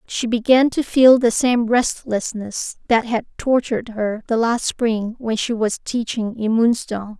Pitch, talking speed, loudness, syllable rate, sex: 230 Hz, 165 wpm, -19 LUFS, 4.2 syllables/s, female